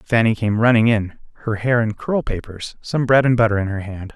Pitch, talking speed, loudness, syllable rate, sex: 115 Hz, 230 wpm, -18 LUFS, 5.3 syllables/s, male